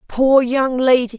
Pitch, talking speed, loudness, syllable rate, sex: 255 Hz, 150 wpm, -15 LUFS, 3.9 syllables/s, female